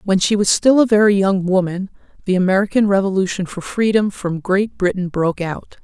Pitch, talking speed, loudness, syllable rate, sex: 195 Hz, 185 wpm, -17 LUFS, 5.4 syllables/s, female